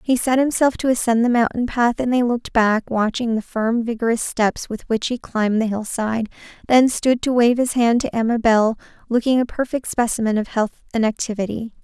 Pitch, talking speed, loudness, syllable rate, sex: 235 Hz, 205 wpm, -19 LUFS, 5.3 syllables/s, female